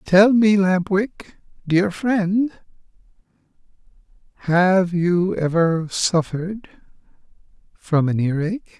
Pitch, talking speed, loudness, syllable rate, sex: 185 Hz, 90 wpm, -19 LUFS, 3.2 syllables/s, male